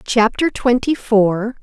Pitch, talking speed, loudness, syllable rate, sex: 230 Hz, 110 wpm, -16 LUFS, 3.4 syllables/s, female